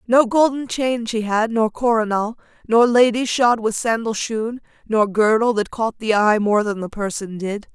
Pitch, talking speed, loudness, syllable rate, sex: 225 Hz, 185 wpm, -19 LUFS, 4.5 syllables/s, female